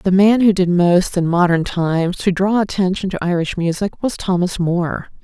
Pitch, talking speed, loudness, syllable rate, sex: 185 Hz, 195 wpm, -17 LUFS, 4.9 syllables/s, female